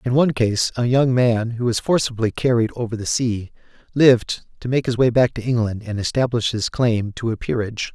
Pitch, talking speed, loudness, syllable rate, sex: 120 Hz, 210 wpm, -20 LUFS, 5.4 syllables/s, male